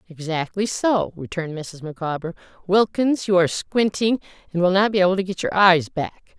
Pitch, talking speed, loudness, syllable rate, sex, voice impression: 185 Hz, 180 wpm, -21 LUFS, 2.5 syllables/s, female, very feminine, slightly gender-neutral, slightly adult-like, slightly thin, very tensed, powerful, bright, very hard, very clear, very fluent, raspy, very cool, slightly intellectual, very refreshing, very sincere, calm, friendly, very reassuring, very unique, elegant, very wild, slightly sweet, lively, very strict, slightly intense, sharp